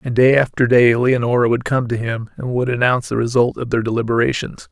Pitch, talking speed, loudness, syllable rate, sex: 120 Hz, 215 wpm, -17 LUFS, 5.9 syllables/s, male